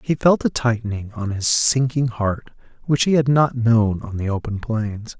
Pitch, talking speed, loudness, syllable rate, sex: 115 Hz, 195 wpm, -20 LUFS, 4.5 syllables/s, male